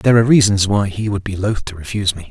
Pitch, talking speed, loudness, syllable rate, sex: 100 Hz, 285 wpm, -16 LUFS, 7.1 syllables/s, male